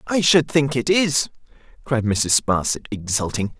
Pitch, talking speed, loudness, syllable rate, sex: 125 Hz, 150 wpm, -19 LUFS, 4.4 syllables/s, male